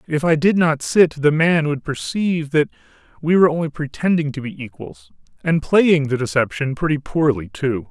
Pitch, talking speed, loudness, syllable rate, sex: 145 Hz, 175 wpm, -18 LUFS, 5.1 syllables/s, male